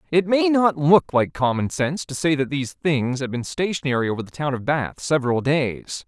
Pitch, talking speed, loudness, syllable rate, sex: 145 Hz, 215 wpm, -21 LUFS, 5.3 syllables/s, male